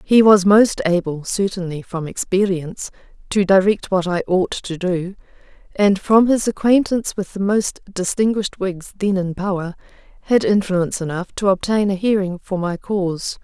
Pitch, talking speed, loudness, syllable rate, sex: 190 Hz, 160 wpm, -18 LUFS, 4.9 syllables/s, female